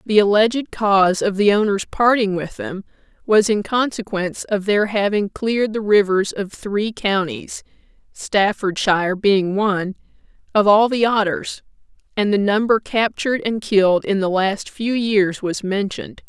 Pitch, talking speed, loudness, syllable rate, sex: 205 Hz, 150 wpm, -18 LUFS, 4.2 syllables/s, female